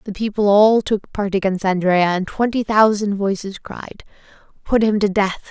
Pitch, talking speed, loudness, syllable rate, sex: 205 Hz, 175 wpm, -17 LUFS, 4.7 syllables/s, female